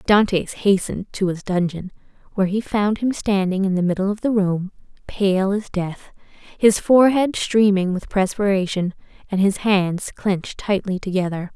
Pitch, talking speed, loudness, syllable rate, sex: 195 Hz, 155 wpm, -20 LUFS, 4.7 syllables/s, female